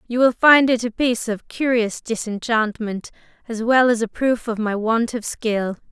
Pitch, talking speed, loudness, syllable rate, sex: 230 Hz, 195 wpm, -19 LUFS, 4.6 syllables/s, female